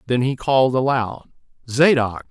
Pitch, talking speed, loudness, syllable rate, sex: 125 Hz, 130 wpm, -19 LUFS, 4.8 syllables/s, male